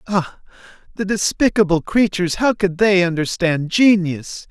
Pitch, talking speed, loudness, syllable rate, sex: 185 Hz, 120 wpm, -17 LUFS, 4.5 syllables/s, male